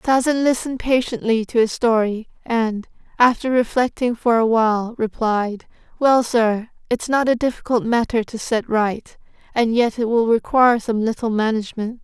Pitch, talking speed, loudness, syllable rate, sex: 230 Hz, 155 wpm, -19 LUFS, 4.8 syllables/s, female